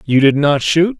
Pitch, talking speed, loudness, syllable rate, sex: 150 Hz, 240 wpm, -13 LUFS, 4.5 syllables/s, male